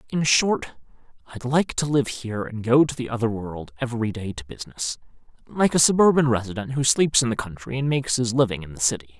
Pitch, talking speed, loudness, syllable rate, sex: 120 Hz, 215 wpm, -22 LUFS, 6.0 syllables/s, male